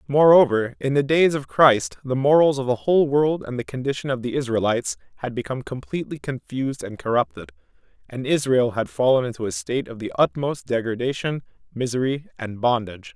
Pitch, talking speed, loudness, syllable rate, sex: 130 Hz, 175 wpm, -22 LUFS, 5.9 syllables/s, male